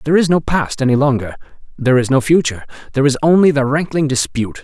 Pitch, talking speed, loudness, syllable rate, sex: 140 Hz, 205 wpm, -15 LUFS, 7.2 syllables/s, male